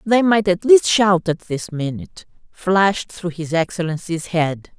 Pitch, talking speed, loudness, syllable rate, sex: 180 Hz, 165 wpm, -18 LUFS, 4.3 syllables/s, female